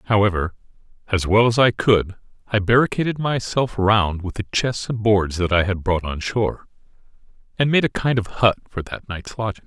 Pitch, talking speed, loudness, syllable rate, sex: 105 Hz, 190 wpm, -20 LUFS, 5.1 syllables/s, male